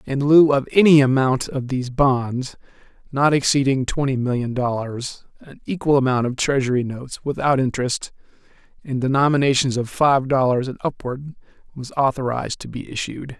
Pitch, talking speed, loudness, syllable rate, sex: 135 Hz, 150 wpm, -20 LUFS, 5.2 syllables/s, male